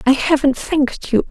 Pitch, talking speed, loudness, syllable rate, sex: 275 Hz, 185 wpm, -17 LUFS, 5.1 syllables/s, female